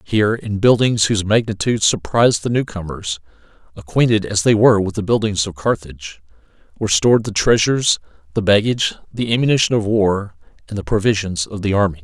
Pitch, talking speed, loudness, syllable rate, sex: 105 Hz, 165 wpm, -17 LUFS, 6.1 syllables/s, male